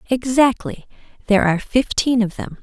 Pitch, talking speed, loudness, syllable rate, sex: 235 Hz, 135 wpm, -18 LUFS, 5.5 syllables/s, female